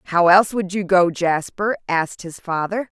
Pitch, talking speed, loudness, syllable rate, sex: 185 Hz, 180 wpm, -19 LUFS, 4.7 syllables/s, female